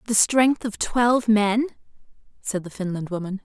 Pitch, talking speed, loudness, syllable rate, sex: 215 Hz, 155 wpm, -22 LUFS, 4.8 syllables/s, female